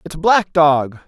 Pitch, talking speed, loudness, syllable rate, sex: 165 Hz, 170 wpm, -15 LUFS, 3.3 syllables/s, male